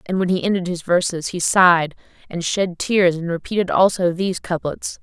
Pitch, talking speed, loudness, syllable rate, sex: 180 Hz, 190 wpm, -19 LUFS, 5.3 syllables/s, female